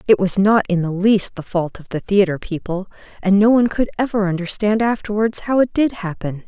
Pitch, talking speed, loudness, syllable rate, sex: 200 Hz, 215 wpm, -18 LUFS, 5.5 syllables/s, female